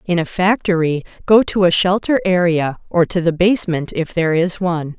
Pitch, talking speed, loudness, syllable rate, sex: 175 Hz, 190 wpm, -16 LUFS, 5.2 syllables/s, female